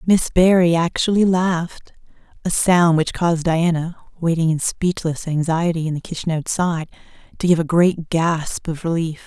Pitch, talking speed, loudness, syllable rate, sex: 170 Hz, 150 wpm, -19 LUFS, 4.9 syllables/s, female